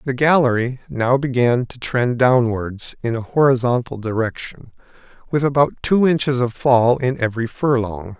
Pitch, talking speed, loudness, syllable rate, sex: 125 Hz, 145 wpm, -18 LUFS, 4.7 syllables/s, male